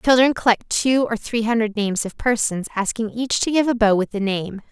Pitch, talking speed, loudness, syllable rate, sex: 225 Hz, 230 wpm, -20 LUFS, 5.3 syllables/s, female